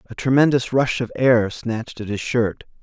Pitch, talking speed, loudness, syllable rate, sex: 120 Hz, 190 wpm, -20 LUFS, 4.8 syllables/s, male